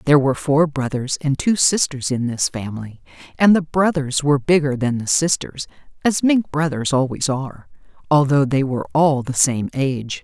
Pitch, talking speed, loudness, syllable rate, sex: 140 Hz, 175 wpm, -18 LUFS, 4.6 syllables/s, female